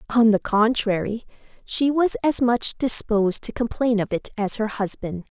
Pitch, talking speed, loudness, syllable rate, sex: 225 Hz, 165 wpm, -21 LUFS, 4.6 syllables/s, female